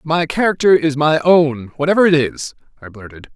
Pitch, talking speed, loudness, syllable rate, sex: 150 Hz, 180 wpm, -14 LUFS, 5.3 syllables/s, male